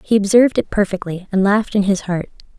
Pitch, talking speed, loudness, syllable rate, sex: 200 Hz, 210 wpm, -17 LUFS, 6.4 syllables/s, female